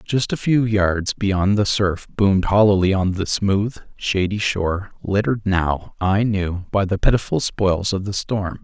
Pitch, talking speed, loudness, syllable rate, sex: 100 Hz, 175 wpm, -20 LUFS, 4.3 syllables/s, male